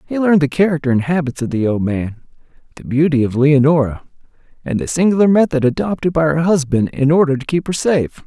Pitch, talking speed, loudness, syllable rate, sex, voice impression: 145 Hz, 205 wpm, -16 LUFS, 6.2 syllables/s, male, very masculine, adult-like, slightly middle-aged, thick, tensed, slightly powerful, bright, soft, very clear, fluent, cool, intellectual, slightly refreshing, sincere, slightly calm, mature, very friendly, reassuring, unique, elegant, slightly wild, sweet, slightly lively, kind, slightly intense, slightly modest